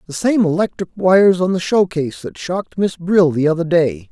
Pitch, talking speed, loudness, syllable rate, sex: 175 Hz, 205 wpm, -16 LUFS, 5.3 syllables/s, male